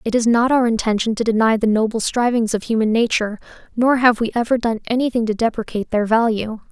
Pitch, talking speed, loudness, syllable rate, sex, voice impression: 225 Hz, 205 wpm, -18 LUFS, 6.2 syllables/s, female, very feminine, very young, very thin, very tensed, powerful, very bright, soft, very clear, very fluent, very cute, intellectual, very refreshing, sincere, calm, mature, very friendly, very reassuring, very unique, very elegant, slightly wild, very sweet, lively, kind, slightly intense, very light